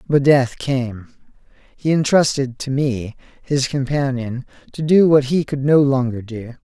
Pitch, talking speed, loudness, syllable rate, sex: 135 Hz, 145 wpm, -18 LUFS, 4.1 syllables/s, male